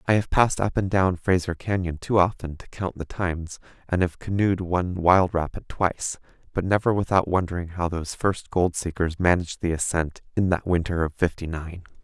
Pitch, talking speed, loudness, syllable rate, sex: 90 Hz, 195 wpm, -24 LUFS, 5.4 syllables/s, male